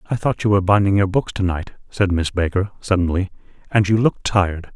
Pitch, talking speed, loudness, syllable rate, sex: 95 Hz, 215 wpm, -19 LUFS, 6.0 syllables/s, male